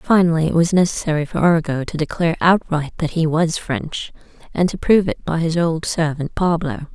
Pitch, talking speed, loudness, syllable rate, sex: 165 Hz, 190 wpm, -19 LUFS, 5.5 syllables/s, female